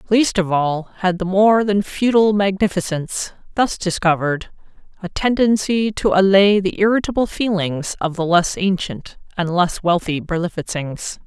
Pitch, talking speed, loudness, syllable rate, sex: 190 Hz, 140 wpm, -18 LUFS, 4.6 syllables/s, female